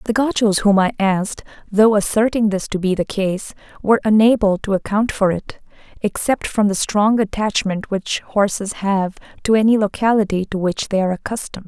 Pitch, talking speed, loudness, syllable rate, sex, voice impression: 205 Hz, 175 wpm, -18 LUFS, 5.2 syllables/s, female, very feminine, slightly young, very adult-like, very thin, relaxed, weak, slightly dark, soft, clear, very fluent, slightly raspy, very cute, very intellectual, refreshing, very sincere, very calm, very friendly, very reassuring, very unique, very elegant, slightly wild, very sweet, slightly lively, very kind, slightly sharp, modest, light